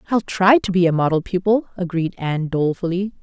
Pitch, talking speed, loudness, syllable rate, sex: 180 Hz, 185 wpm, -19 LUFS, 6.0 syllables/s, female